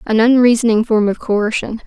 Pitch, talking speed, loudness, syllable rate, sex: 225 Hz, 160 wpm, -14 LUFS, 5.2 syllables/s, female